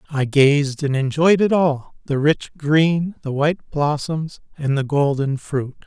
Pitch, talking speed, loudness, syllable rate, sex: 150 Hz, 165 wpm, -19 LUFS, 3.9 syllables/s, male